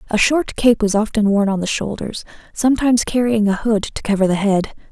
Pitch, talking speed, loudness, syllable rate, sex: 215 Hz, 210 wpm, -17 LUFS, 5.6 syllables/s, female